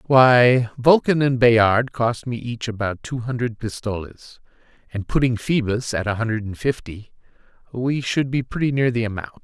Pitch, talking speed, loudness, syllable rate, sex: 120 Hz, 165 wpm, -20 LUFS, 4.7 syllables/s, male